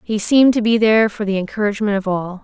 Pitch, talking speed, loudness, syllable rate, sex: 210 Hz, 245 wpm, -16 LUFS, 6.9 syllables/s, female